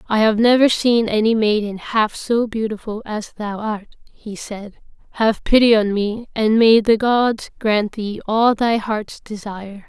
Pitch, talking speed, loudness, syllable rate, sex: 220 Hz, 170 wpm, -18 LUFS, 4.1 syllables/s, female